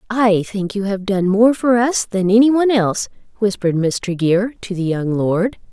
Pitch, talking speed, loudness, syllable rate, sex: 205 Hz, 200 wpm, -17 LUFS, 5.0 syllables/s, female